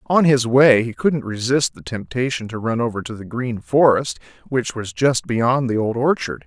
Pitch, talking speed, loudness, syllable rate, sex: 120 Hz, 205 wpm, -19 LUFS, 4.6 syllables/s, male